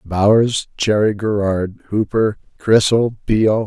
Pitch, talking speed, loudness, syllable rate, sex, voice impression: 105 Hz, 115 wpm, -17 LUFS, 3.9 syllables/s, male, very masculine, adult-like, thick, cool, sincere, calm, slightly wild